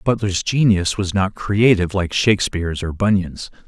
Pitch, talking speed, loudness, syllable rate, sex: 95 Hz, 145 wpm, -18 LUFS, 4.9 syllables/s, male